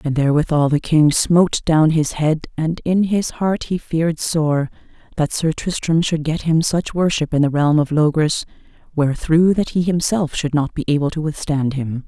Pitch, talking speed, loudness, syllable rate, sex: 155 Hz, 195 wpm, -18 LUFS, 4.8 syllables/s, female